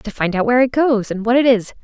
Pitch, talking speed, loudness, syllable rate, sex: 235 Hz, 325 wpm, -16 LUFS, 6.3 syllables/s, female